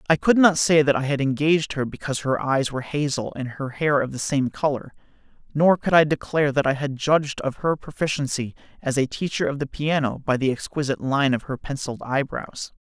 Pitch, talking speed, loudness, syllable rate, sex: 140 Hz, 215 wpm, -22 LUFS, 5.8 syllables/s, male